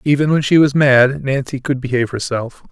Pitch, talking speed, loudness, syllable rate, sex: 135 Hz, 200 wpm, -15 LUFS, 5.5 syllables/s, male